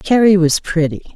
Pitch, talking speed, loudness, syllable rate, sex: 180 Hz, 155 wpm, -14 LUFS, 5.0 syllables/s, female